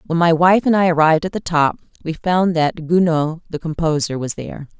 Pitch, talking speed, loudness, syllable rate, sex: 165 Hz, 215 wpm, -17 LUFS, 5.4 syllables/s, female